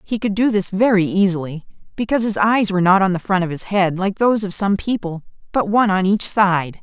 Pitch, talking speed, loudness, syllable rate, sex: 195 Hz, 235 wpm, -17 LUFS, 5.9 syllables/s, female